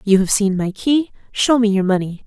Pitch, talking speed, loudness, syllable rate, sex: 210 Hz, 240 wpm, -17 LUFS, 5.1 syllables/s, female